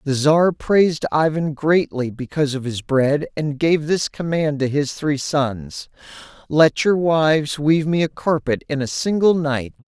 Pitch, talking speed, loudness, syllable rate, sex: 150 Hz, 170 wpm, -19 LUFS, 4.3 syllables/s, male